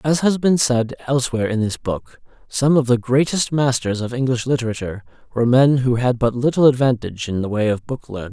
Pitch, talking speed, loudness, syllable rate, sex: 125 Hz, 210 wpm, -19 LUFS, 6.0 syllables/s, male